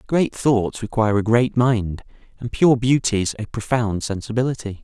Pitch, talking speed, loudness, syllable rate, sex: 115 Hz, 150 wpm, -20 LUFS, 4.6 syllables/s, male